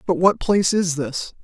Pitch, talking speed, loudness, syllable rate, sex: 175 Hz, 210 wpm, -19 LUFS, 4.9 syllables/s, female